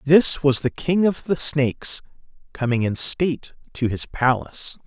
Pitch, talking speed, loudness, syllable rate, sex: 140 Hz, 160 wpm, -21 LUFS, 4.5 syllables/s, male